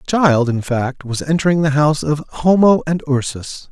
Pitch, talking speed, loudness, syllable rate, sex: 145 Hz, 195 wpm, -16 LUFS, 4.8 syllables/s, male